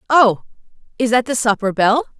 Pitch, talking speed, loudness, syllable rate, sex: 240 Hz, 165 wpm, -16 LUFS, 5.2 syllables/s, female